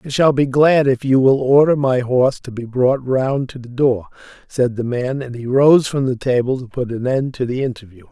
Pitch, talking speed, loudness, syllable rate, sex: 130 Hz, 245 wpm, -17 LUFS, 5.0 syllables/s, male